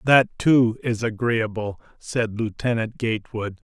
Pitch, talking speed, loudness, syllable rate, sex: 115 Hz, 115 wpm, -23 LUFS, 4.1 syllables/s, male